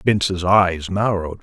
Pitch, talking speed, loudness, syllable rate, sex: 95 Hz, 125 wpm, -18 LUFS, 4.6 syllables/s, male